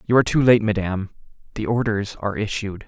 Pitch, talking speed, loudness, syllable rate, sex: 105 Hz, 190 wpm, -21 LUFS, 6.4 syllables/s, male